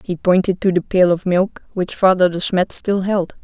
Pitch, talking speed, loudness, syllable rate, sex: 185 Hz, 225 wpm, -17 LUFS, 4.7 syllables/s, female